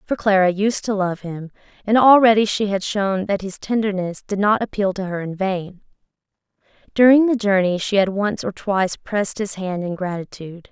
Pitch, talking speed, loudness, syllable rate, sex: 200 Hz, 190 wpm, -19 LUFS, 5.2 syllables/s, female